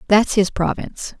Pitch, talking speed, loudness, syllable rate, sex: 200 Hz, 150 wpm, -19 LUFS, 5.2 syllables/s, female